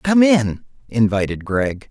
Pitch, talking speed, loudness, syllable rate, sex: 125 Hz, 125 wpm, -18 LUFS, 3.7 syllables/s, male